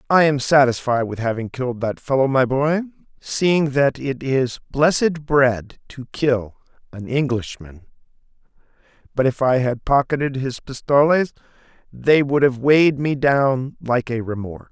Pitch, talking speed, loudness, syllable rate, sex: 135 Hz, 145 wpm, -19 LUFS, 4.4 syllables/s, male